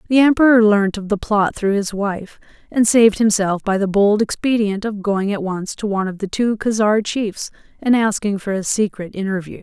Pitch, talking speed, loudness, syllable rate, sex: 210 Hz, 205 wpm, -18 LUFS, 5.1 syllables/s, female